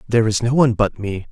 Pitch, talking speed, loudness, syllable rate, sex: 110 Hz, 275 wpm, -18 LUFS, 7.0 syllables/s, male